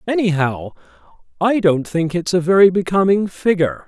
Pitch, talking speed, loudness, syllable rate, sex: 175 Hz, 140 wpm, -16 LUFS, 5.2 syllables/s, male